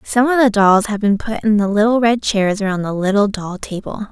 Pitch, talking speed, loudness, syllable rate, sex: 210 Hz, 250 wpm, -16 LUFS, 5.3 syllables/s, female